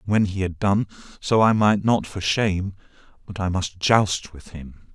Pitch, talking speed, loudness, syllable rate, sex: 100 Hz, 205 wpm, -21 LUFS, 4.5 syllables/s, male